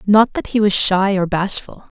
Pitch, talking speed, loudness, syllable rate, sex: 195 Hz, 210 wpm, -16 LUFS, 4.4 syllables/s, female